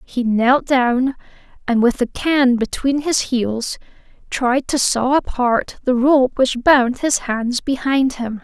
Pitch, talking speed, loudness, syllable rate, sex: 255 Hz, 155 wpm, -17 LUFS, 3.5 syllables/s, female